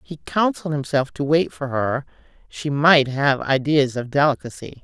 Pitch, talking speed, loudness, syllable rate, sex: 145 Hz, 160 wpm, -20 LUFS, 4.7 syllables/s, female